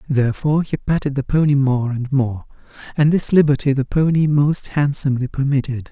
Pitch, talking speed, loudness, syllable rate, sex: 140 Hz, 160 wpm, -18 LUFS, 5.5 syllables/s, male